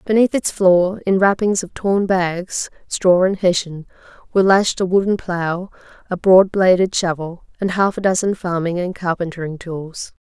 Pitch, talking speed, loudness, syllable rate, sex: 185 Hz, 165 wpm, -18 LUFS, 4.5 syllables/s, female